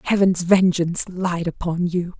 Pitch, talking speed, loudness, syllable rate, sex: 175 Hz, 135 wpm, -20 LUFS, 4.5 syllables/s, female